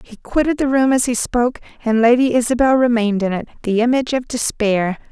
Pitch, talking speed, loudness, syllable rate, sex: 240 Hz, 200 wpm, -17 LUFS, 6.0 syllables/s, female